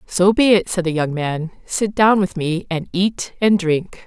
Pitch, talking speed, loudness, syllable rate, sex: 180 Hz, 220 wpm, -18 LUFS, 4.0 syllables/s, female